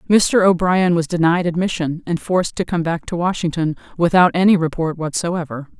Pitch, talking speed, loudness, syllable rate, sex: 170 Hz, 165 wpm, -18 LUFS, 5.3 syllables/s, female